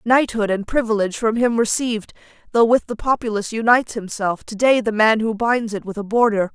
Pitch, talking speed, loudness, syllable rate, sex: 220 Hz, 200 wpm, -19 LUFS, 5.8 syllables/s, female